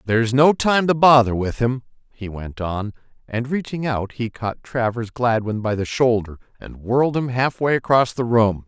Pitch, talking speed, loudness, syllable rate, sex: 120 Hz, 195 wpm, -20 LUFS, 4.7 syllables/s, male